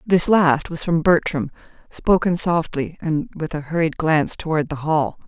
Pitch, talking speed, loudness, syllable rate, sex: 160 Hz, 170 wpm, -19 LUFS, 4.5 syllables/s, female